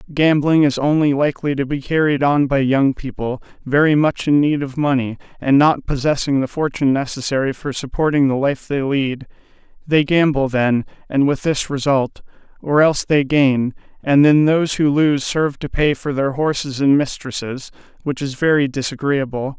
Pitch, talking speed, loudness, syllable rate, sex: 140 Hz, 175 wpm, -17 LUFS, 5.1 syllables/s, male